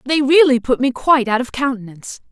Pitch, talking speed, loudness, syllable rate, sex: 260 Hz, 210 wpm, -15 LUFS, 6.1 syllables/s, female